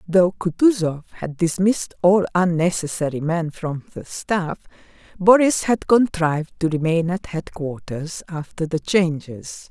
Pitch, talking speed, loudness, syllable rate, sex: 175 Hz, 125 wpm, -20 LUFS, 4.2 syllables/s, female